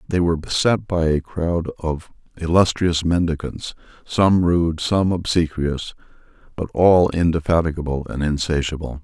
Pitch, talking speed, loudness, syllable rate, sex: 85 Hz, 120 wpm, -20 LUFS, 4.5 syllables/s, male